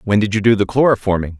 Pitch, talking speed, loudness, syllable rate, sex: 105 Hz, 260 wpm, -15 LUFS, 7.0 syllables/s, male